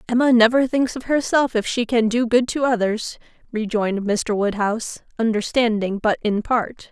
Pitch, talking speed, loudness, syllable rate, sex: 230 Hz, 165 wpm, -20 LUFS, 4.9 syllables/s, female